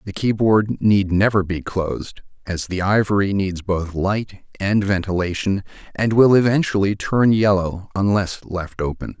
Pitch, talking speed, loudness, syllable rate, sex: 100 Hz, 145 wpm, -19 LUFS, 4.3 syllables/s, male